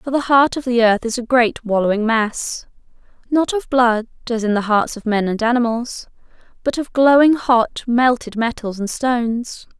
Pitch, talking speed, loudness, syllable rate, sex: 240 Hz, 185 wpm, -17 LUFS, 4.6 syllables/s, female